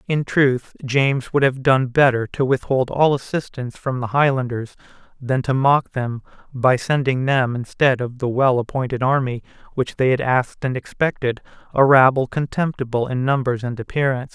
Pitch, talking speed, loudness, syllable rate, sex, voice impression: 130 Hz, 165 wpm, -19 LUFS, 5.0 syllables/s, male, masculine, adult-like, thin, slightly weak, fluent, refreshing, calm, unique, kind, modest